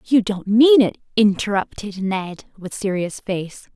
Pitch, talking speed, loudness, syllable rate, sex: 205 Hz, 145 wpm, -19 LUFS, 4.0 syllables/s, female